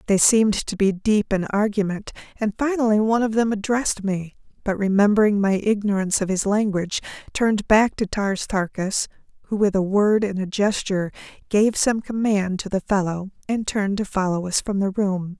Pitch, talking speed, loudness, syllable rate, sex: 205 Hz, 180 wpm, -21 LUFS, 5.2 syllables/s, female